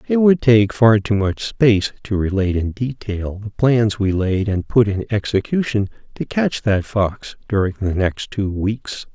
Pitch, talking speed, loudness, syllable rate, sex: 105 Hz, 185 wpm, -18 LUFS, 4.3 syllables/s, male